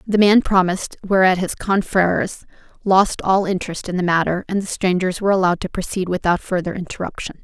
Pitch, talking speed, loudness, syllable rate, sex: 185 Hz, 180 wpm, -19 LUFS, 5.9 syllables/s, female